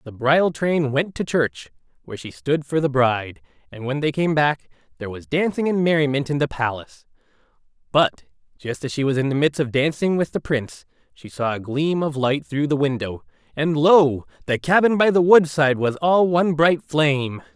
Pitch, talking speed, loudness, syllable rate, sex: 145 Hz, 205 wpm, -20 LUFS, 5.2 syllables/s, male